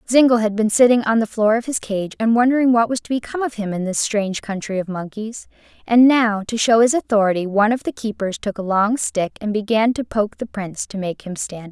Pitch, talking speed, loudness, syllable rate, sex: 220 Hz, 250 wpm, -19 LUFS, 5.9 syllables/s, female